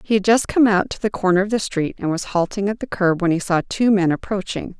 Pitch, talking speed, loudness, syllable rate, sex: 195 Hz, 290 wpm, -19 LUFS, 5.8 syllables/s, female